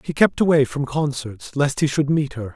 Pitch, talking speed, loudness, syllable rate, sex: 140 Hz, 235 wpm, -20 LUFS, 4.9 syllables/s, male